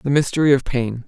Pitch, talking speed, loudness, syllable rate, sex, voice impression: 135 Hz, 225 wpm, -18 LUFS, 5.8 syllables/s, male, masculine, adult-like, slightly weak, slightly calm, slightly friendly, kind